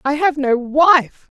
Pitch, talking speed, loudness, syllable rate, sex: 285 Hz, 170 wpm, -15 LUFS, 3.4 syllables/s, female